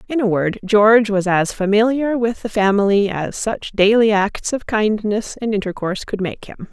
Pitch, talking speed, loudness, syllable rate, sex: 210 Hz, 190 wpm, -17 LUFS, 4.8 syllables/s, female